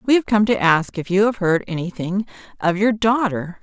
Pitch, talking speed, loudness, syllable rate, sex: 200 Hz, 215 wpm, -19 LUFS, 5.0 syllables/s, female